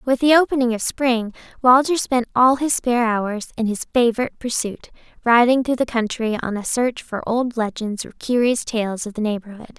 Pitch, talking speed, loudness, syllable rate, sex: 235 Hz, 190 wpm, -20 LUFS, 5.2 syllables/s, female